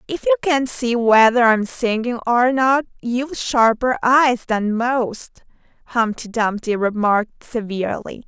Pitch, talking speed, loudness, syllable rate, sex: 240 Hz, 130 wpm, -18 LUFS, 4.0 syllables/s, female